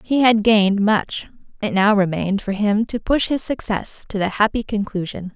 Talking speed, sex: 190 wpm, female